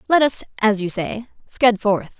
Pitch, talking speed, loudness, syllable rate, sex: 220 Hz, 190 wpm, -19 LUFS, 4.3 syllables/s, female